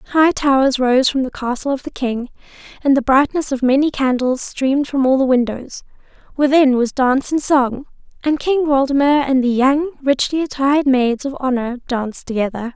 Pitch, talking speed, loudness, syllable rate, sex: 265 Hz, 180 wpm, -17 LUFS, 5.1 syllables/s, female